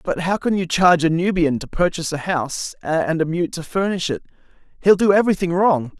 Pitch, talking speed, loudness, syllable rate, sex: 170 Hz, 210 wpm, -19 LUFS, 6.0 syllables/s, male